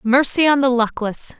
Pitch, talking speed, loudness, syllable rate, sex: 250 Hz, 175 wpm, -16 LUFS, 4.7 syllables/s, female